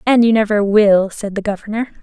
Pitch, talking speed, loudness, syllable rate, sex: 210 Hz, 205 wpm, -15 LUFS, 5.5 syllables/s, female